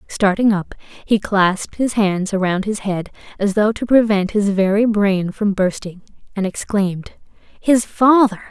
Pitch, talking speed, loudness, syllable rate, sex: 205 Hz, 155 wpm, -17 LUFS, 4.4 syllables/s, female